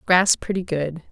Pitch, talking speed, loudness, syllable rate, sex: 170 Hz, 160 wpm, -21 LUFS, 4.3 syllables/s, female